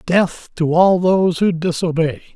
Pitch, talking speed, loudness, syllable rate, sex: 170 Hz, 155 wpm, -17 LUFS, 4.2 syllables/s, male